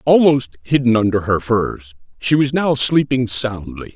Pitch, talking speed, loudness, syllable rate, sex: 125 Hz, 150 wpm, -17 LUFS, 4.3 syllables/s, male